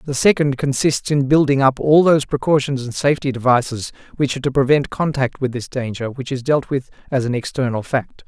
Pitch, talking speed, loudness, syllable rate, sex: 135 Hz, 205 wpm, -18 LUFS, 5.6 syllables/s, male